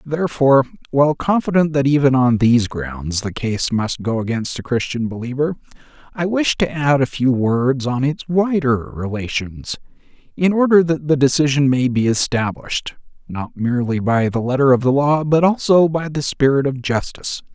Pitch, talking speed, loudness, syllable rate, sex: 135 Hz, 170 wpm, -18 LUFS, 5.0 syllables/s, male